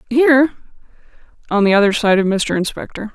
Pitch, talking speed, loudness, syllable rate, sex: 225 Hz, 155 wpm, -15 LUFS, 2.5 syllables/s, female